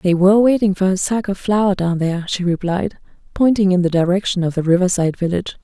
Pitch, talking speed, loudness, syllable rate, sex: 185 Hz, 225 wpm, -17 LUFS, 6.0 syllables/s, female